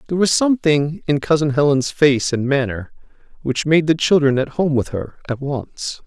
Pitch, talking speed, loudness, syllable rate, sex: 145 Hz, 190 wpm, -18 LUFS, 5.0 syllables/s, male